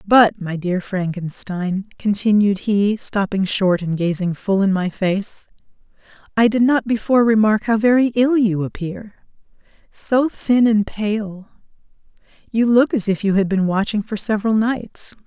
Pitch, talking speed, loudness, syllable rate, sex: 205 Hz, 155 wpm, -18 LUFS, 4.3 syllables/s, female